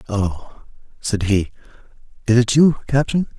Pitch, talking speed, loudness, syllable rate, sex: 115 Hz, 125 wpm, -18 LUFS, 4.1 syllables/s, male